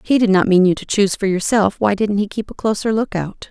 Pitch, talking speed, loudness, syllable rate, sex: 200 Hz, 310 wpm, -17 LUFS, 6.2 syllables/s, female